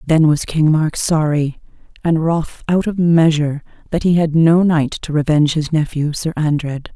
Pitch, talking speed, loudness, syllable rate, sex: 155 Hz, 180 wpm, -16 LUFS, 4.6 syllables/s, female